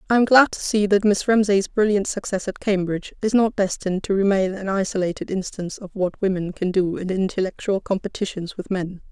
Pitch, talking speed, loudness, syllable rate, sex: 195 Hz, 195 wpm, -21 LUFS, 5.7 syllables/s, female